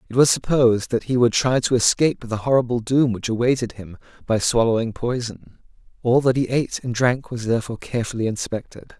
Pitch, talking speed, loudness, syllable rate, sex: 120 Hz, 185 wpm, -20 LUFS, 5.9 syllables/s, male